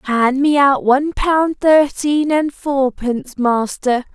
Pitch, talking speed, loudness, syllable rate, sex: 270 Hz, 130 wpm, -16 LUFS, 3.6 syllables/s, female